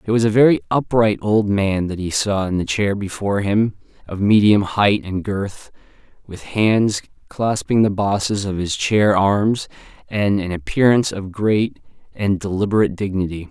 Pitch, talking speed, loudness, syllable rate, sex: 100 Hz, 165 wpm, -18 LUFS, 4.6 syllables/s, male